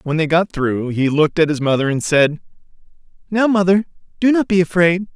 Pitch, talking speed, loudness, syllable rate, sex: 170 Hz, 200 wpm, -16 LUFS, 5.5 syllables/s, male